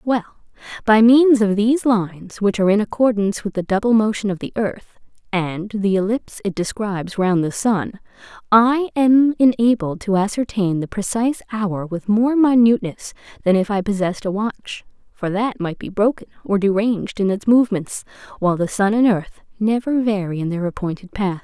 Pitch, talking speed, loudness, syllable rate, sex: 210 Hz, 175 wpm, -19 LUFS, 5.2 syllables/s, female